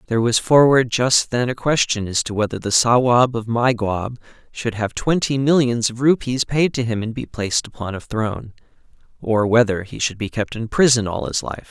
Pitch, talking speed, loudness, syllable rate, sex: 120 Hz, 205 wpm, -19 LUFS, 5.1 syllables/s, male